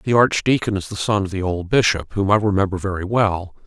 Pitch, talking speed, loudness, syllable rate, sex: 100 Hz, 230 wpm, -19 LUFS, 5.7 syllables/s, male